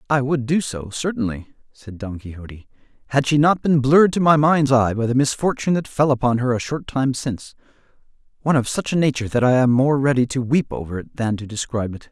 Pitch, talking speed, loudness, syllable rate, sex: 130 Hz, 230 wpm, -19 LUFS, 6.1 syllables/s, male